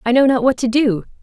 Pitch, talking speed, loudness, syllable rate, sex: 245 Hz, 295 wpm, -16 LUFS, 6.2 syllables/s, female